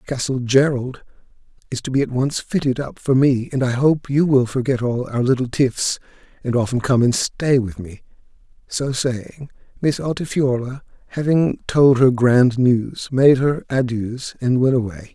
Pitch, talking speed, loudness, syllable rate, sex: 130 Hz, 170 wpm, -19 LUFS, 4.4 syllables/s, male